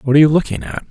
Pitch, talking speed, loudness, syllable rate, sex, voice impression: 130 Hz, 335 wpm, -15 LUFS, 8.4 syllables/s, male, very masculine, very adult-like, old, very thick, slightly relaxed, weak, slightly dark, hard, muffled, slightly fluent, very raspy, very cool, intellectual, sincere, very calm, very mature, friendly, very reassuring, very unique, slightly elegant, very wild, slightly sweet, slightly lively, very kind